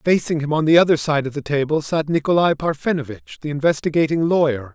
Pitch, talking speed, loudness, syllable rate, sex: 150 Hz, 190 wpm, -19 LUFS, 6.0 syllables/s, male